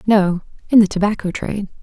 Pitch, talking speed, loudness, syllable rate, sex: 200 Hz, 165 wpm, -18 LUFS, 6.0 syllables/s, female